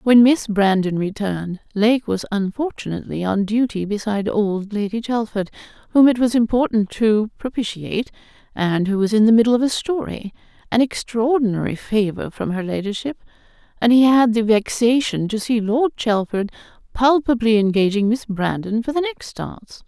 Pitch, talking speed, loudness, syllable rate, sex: 220 Hz, 150 wpm, -19 LUFS, 5.1 syllables/s, female